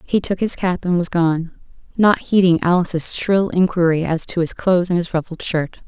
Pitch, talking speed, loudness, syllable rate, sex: 175 Hz, 205 wpm, -18 LUFS, 5.1 syllables/s, female